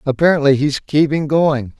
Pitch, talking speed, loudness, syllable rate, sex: 145 Hz, 135 wpm, -15 LUFS, 4.9 syllables/s, male